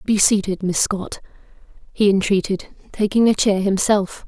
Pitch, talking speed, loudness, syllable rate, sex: 200 Hz, 140 wpm, -18 LUFS, 4.7 syllables/s, female